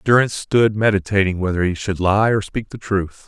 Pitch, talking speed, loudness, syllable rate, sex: 100 Hz, 200 wpm, -18 LUFS, 5.4 syllables/s, male